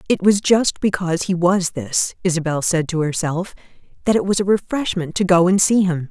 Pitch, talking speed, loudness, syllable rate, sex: 180 Hz, 205 wpm, -18 LUFS, 5.3 syllables/s, female